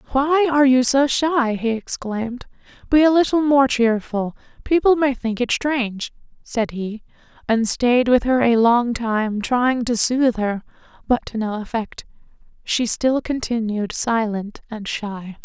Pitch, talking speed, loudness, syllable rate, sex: 245 Hz, 150 wpm, -19 LUFS, 4.1 syllables/s, female